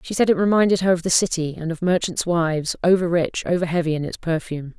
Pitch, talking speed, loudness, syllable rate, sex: 170 Hz, 240 wpm, -21 LUFS, 6.3 syllables/s, female